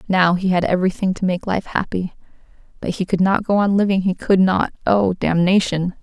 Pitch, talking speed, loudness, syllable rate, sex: 185 Hz, 200 wpm, -18 LUFS, 5.4 syllables/s, female